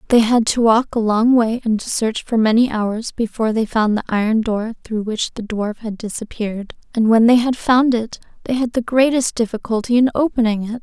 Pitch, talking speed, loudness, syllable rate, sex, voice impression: 225 Hz, 215 wpm, -18 LUFS, 5.3 syllables/s, female, feminine, slightly adult-like, slightly soft, slightly sincere, slightly calm, slightly kind